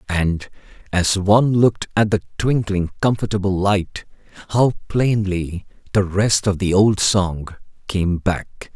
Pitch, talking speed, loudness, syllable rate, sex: 100 Hz, 130 wpm, -19 LUFS, 3.9 syllables/s, male